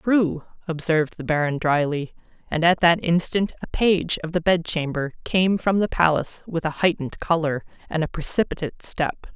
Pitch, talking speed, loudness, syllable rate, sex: 165 Hz, 165 wpm, -22 LUFS, 5.2 syllables/s, female